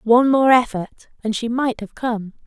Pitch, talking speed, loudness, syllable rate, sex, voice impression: 235 Hz, 195 wpm, -19 LUFS, 4.6 syllables/s, female, very feminine, slightly adult-like, thin, tensed, powerful, bright, slightly hard, very clear, fluent, cute, slightly intellectual, refreshing, sincere, calm, friendly, reassuring, very unique, elegant, slightly wild, slightly sweet, lively, strict, slightly intense, sharp